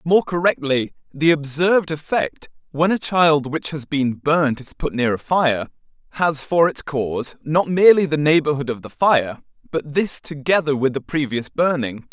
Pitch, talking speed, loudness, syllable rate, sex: 150 Hz, 175 wpm, -19 LUFS, 4.6 syllables/s, male